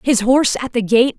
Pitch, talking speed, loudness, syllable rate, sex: 245 Hz, 255 wpm, -15 LUFS, 5.9 syllables/s, female